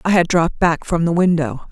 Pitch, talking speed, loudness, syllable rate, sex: 170 Hz, 245 wpm, -17 LUFS, 5.9 syllables/s, female